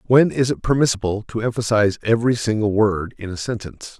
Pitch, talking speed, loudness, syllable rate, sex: 110 Hz, 180 wpm, -20 LUFS, 6.2 syllables/s, male